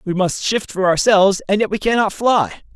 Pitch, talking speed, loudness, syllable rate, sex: 195 Hz, 220 wpm, -17 LUFS, 5.4 syllables/s, male